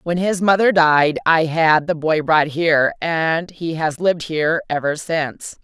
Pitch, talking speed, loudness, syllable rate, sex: 160 Hz, 180 wpm, -17 LUFS, 4.4 syllables/s, female